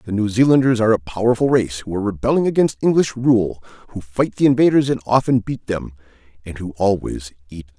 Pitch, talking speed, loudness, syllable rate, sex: 110 Hz, 200 wpm, -18 LUFS, 6.1 syllables/s, male